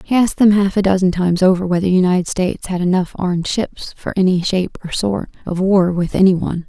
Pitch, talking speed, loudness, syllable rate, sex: 185 Hz, 235 wpm, -16 LUFS, 6.3 syllables/s, female